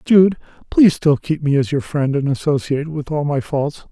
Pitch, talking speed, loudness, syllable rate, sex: 150 Hz, 215 wpm, -18 LUFS, 5.2 syllables/s, male